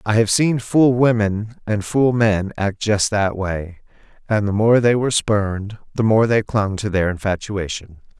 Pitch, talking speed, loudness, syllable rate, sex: 105 Hz, 185 wpm, -18 LUFS, 4.3 syllables/s, male